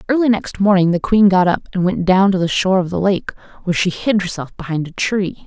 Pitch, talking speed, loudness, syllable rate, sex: 190 Hz, 255 wpm, -16 LUFS, 5.9 syllables/s, female